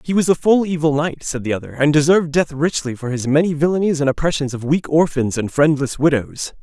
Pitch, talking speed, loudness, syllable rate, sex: 150 Hz, 225 wpm, -18 LUFS, 5.9 syllables/s, male